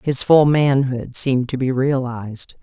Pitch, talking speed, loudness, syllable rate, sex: 130 Hz, 160 wpm, -18 LUFS, 4.4 syllables/s, female